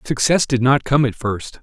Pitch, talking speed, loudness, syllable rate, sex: 130 Hz, 220 wpm, -17 LUFS, 4.6 syllables/s, male